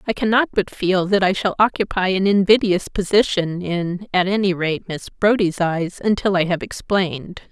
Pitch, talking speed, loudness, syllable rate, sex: 190 Hz, 175 wpm, -19 LUFS, 4.8 syllables/s, female